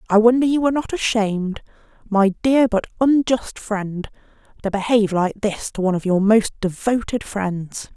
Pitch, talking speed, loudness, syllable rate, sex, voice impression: 215 Hz, 165 wpm, -19 LUFS, 4.9 syllables/s, female, very feminine, thin, tensed, slightly powerful, slightly bright, hard, clear, very fluent, slightly raspy, slightly cool, intellectual, refreshing, sincere, slightly calm, slightly friendly, slightly reassuring, very unique, slightly elegant, wild, slightly sweet, very lively, strict, very intense, sharp, slightly light